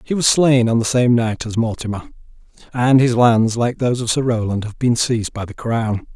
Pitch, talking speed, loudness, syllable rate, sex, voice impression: 120 Hz, 225 wpm, -17 LUFS, 5.2 syllables/s, male, masculine, adult-like, slightly thick, sincere, calm, slightly kind